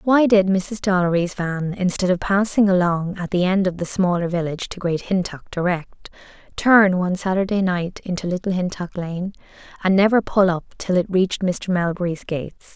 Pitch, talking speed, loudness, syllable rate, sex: 185 Hz, 180 wpm, -20 LUFS, 5.1 syllables/s, female